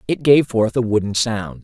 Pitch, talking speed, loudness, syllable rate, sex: 115 Hz, 220 wpm, -17 LUFS, 4.8 syllables/s, male